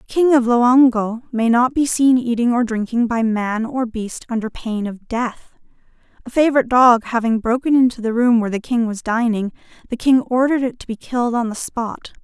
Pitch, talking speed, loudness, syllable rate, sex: 240 Hz, 205 wpm, -18 LUFS, 5.4 syllables/s, female